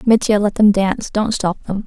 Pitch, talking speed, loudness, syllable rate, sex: 205 Hz, 225 wpm, -16 LUFS, 5.2 syllables/s, female